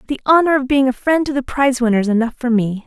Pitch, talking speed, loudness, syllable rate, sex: 255 Hz, 270 wpm, -16 LUFS, 6.8 syllables/s, female